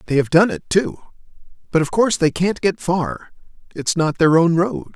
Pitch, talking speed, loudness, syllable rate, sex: 165 Hz, 205 wpm, -18 LUFS, 5.0 syllables/s, male